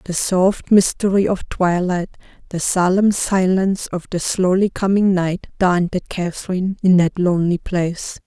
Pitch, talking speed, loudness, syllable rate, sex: 185 Hz, 140 wpm, -18 LUFS, 4.6 syllables/s, female